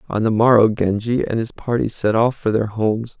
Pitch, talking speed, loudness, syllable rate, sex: 110 Hz, 225 wpm, -18 LUFS, 5.3 syllables/s, male